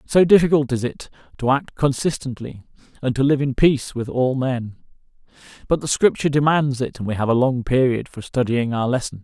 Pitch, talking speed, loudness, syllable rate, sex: 130 Hz, 195 wpm, -20 LUFS, 5.6 syllables/s, male